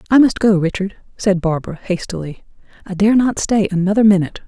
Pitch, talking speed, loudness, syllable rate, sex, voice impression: 195 Hz, 175 wpm, -16 LUFS, 6.1 syllables/s, female, feminine, slightly middle-aged, tensed, powerful, soft, slightly raspy, intellectual, calm, friendly, reassuring, elegant, lively, kind